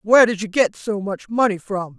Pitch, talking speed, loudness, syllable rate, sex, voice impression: 205 Hz, 240 wpm, -19 LUFS, 5.2 syllables/s, female, feminine, adult-like, bright, clear, fluent, intellectual, elegant, slightly strict, sharp